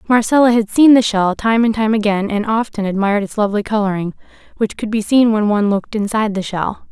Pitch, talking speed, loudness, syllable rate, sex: 215 Hz, 215 wpm, -15 LUFS, 6.3 syllables/s, female